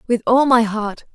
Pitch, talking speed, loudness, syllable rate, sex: 235 Hz, 210 wpm, -16 LUFS, 4.5 syllables/s, female